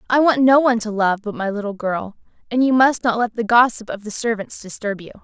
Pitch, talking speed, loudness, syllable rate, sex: 225 Hz, 250 wpm, -19 LUFS, 5.9 syllables/s, female